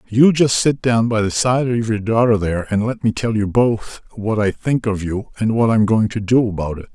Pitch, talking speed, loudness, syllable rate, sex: 110 Hz, 260 wpm, -17 LUFS, 5.2 syllables/s, male